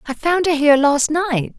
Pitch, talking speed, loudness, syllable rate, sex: 300 Hz, 225 wpm, -16 LUFS, 4.8 syllables/s, female